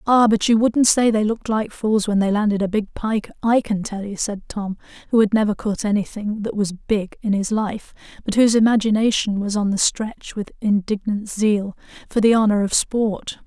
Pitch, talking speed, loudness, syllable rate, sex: 210 Hz, 210 wpm, -20 LUFS, 5.0 syllables/s, female